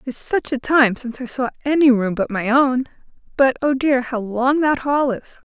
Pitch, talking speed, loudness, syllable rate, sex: 260 Hz, 230 wpm, -18 LUFS, 4.9 syllables/s, female